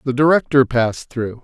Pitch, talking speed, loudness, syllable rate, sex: 130 Hz, 165 wpm, -17 LUFS, 5.3 syllables/s, male